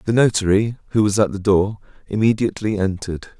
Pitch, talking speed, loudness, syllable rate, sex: 100 Hz, 160 wpm, -19 LUFS, 5.8 syllables/s, male